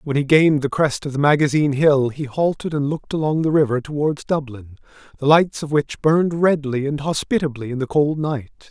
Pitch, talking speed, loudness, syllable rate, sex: 145 Hz, 205 wpm, -19 LUFS, 5.6 syllables/s, male